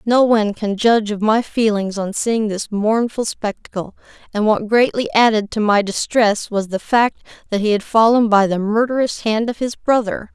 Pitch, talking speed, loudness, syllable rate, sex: 215 Hz, 190 wpm, -17 LUFS, 4.9 syllables/s, female